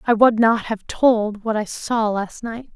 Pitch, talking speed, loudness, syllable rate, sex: 220 Hz, 220 wpm, -19 LUFS, 3.9 syllables/s, female